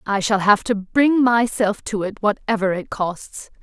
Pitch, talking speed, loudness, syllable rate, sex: 210 Hz, 180 wpm, -19 LUFS, 4.1 syllables/s, female